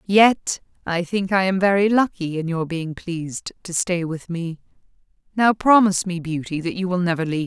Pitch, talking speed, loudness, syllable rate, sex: 180 Hz, 200 wpm, -21 LUFS, 5.2 syllables/s, female